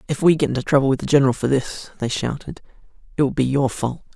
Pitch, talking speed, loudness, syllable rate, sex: 140 Hz, 245 wpm, -20 LUFS, 6.8 syllables/s, male